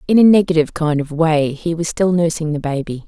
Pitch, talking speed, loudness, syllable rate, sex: 160 Hz, 235 wpm, -16 LUFS, 5.8 syllables/s, female